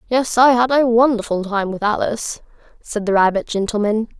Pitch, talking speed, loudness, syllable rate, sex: 225 Hz, 170 wpm, -17 LUFS, 5.4 syllables/s, female